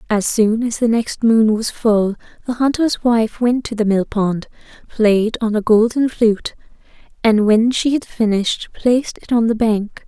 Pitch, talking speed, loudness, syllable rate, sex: 225 Hz, 185 wpm, -17 LUFS, 4.4 syllables/s, female